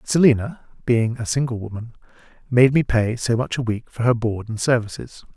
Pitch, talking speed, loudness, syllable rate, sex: 120 Hz, 190 wpm, -20 LUFS, 5.1 syllables/s, male